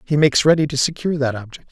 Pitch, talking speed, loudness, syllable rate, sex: 145 Hz, 245 wpm, -18 LUFS, 7.6 syllables/s, male